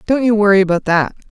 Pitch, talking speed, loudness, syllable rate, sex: 205 Hz, 225 wpm, -14 LUFS, 6.7 syllables/s, female